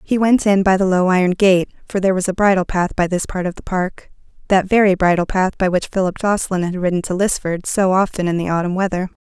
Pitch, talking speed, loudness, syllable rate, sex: 185 Hz, 240 wpm, -17 LUFS, 6.1 syllables/s, female